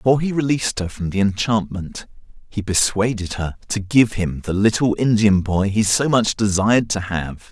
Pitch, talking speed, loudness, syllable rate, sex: 105 Hz, 190 wpm, -19 LUFS, 5.2 syllables/s, male